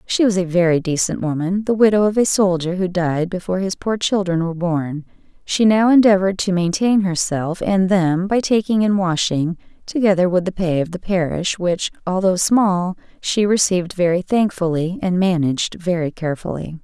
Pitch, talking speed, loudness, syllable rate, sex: 185 Hz, 175 wpm, -18 LUFS, 5.1 syllables/s, female